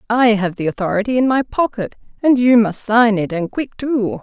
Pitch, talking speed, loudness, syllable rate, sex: 225 Hz, 215 wpm, -16 LUFS, 5.0 syllables/s, female